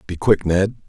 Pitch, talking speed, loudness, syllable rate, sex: 100 Hz, 205 wpm, -18 LUFS, 4.5 syllables/s, male